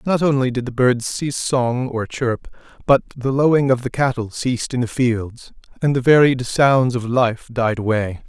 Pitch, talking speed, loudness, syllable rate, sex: 125 Hz, 195 wpm, -18 LUFS, 4.7 syllables/s, male